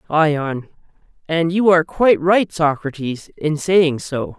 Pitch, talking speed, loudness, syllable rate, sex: 160 Hz, 135 wpm, -17 LUFS, 3.9 syllables/s, male